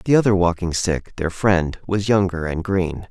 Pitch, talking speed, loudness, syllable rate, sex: 90 Hz, 195 wpm, -20 LUFS, 4.6 syllables/s, male